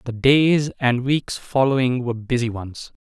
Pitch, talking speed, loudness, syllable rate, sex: 125 Hz, 160 wpm, -20 LUFS, 4.3 syllables/s, male